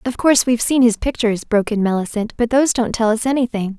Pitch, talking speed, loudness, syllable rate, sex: 230 Hz, 240 wpm, -17 LUFS, 6.9 syllables/s, female